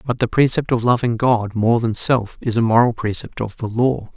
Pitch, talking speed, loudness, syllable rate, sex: 115 Hz, 230 wpm, -18 LUFS, 5.1 syllables/s, male